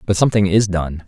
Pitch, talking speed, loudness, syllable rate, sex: 95 Hz, 225 wpm, -17 LUFS, 6.3 syllables/s, male